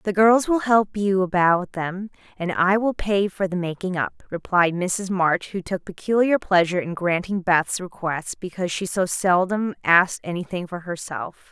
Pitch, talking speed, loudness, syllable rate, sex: 185 Hz, 175 wpm, -22 LUFS, 4.7 syllables/s, female